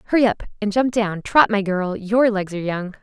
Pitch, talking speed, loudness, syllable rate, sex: 210 Hz, 240 wpm, -20 LUFS, 5.4 syllables/s, female